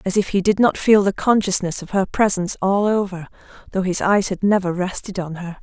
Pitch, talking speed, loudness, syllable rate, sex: 190 Hz, 225 wpm, -19 LUFS, 5.6 syllables/s, female